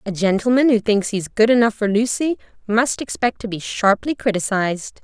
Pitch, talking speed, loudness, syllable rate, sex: 220 Hz, 190 wpm, -19 LUFS, 5.4 syllables/s, female